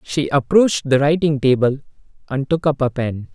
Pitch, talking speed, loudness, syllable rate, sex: 140 Hz, 180 wpm, -18 LUFS, 5.2 syllables/s, male